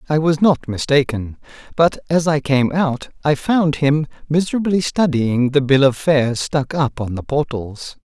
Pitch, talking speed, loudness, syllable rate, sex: 140 Hz, 170 wpm, -18 LUFS, 4.2 syllables/s, male